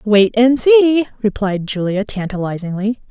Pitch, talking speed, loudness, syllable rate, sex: 220 Hz, 115 wpm, -15 LUFS, 4.3 syllables/s, female